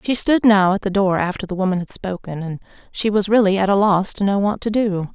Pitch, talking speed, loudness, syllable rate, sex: 195 Hz, 270 wpm, -18 LUFS, 5.7 syllables/s, female